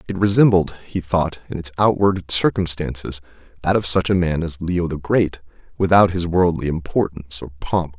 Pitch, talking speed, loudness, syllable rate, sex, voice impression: 85 Hz, 175 wpm, -19 LUFS, 4.9 syllables/s, male, very masculine, adult-like, slightly thick, cool, intellectual, slightly wild